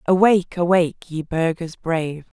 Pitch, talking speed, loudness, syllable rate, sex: 170 Hz, 125 wpm, -20 LUFS, 5.1 syllables/s, female